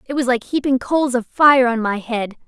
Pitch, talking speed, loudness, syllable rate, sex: 250 Hz, 240 wpm, -17 LUFS, 5.4 syllables/s, female